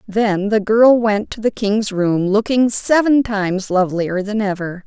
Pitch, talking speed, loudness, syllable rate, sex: 210 Hz, 175 wpm, -16 LUFS, 4.3 syllables/s, female